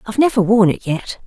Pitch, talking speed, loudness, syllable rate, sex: 210 Hz, 235 wpm, -16 LUFS, 6.2 syllables/s, female